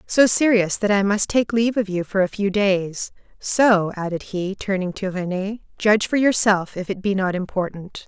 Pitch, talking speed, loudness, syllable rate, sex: 200 Hz, 200 wpm, -20 LUFS, 4.8 syllables/s, female